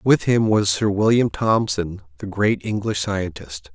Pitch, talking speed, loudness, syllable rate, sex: 105 Hz, 160 wpm, -20 LUFS, 4.0 syllables/s, male